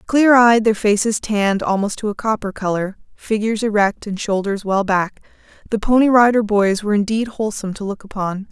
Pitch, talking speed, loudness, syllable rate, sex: 210 Hz, 185 wpm, -18 LUFS, 5.6 syllables/s, female